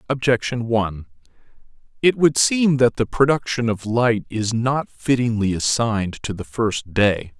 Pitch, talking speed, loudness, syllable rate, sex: 120 Hz, 145 wpm, -20 LUFS, 4.4 syllables/s, male